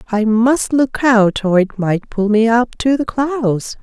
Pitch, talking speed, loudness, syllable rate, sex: 230 Hz, 205 wpm, -15 LUFS, 3.7 syllables/s, female